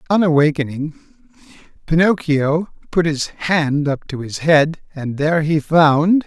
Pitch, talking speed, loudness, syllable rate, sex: 155 Hz, 135 wpm, -17 LUFS, 4.1 syllables/s, male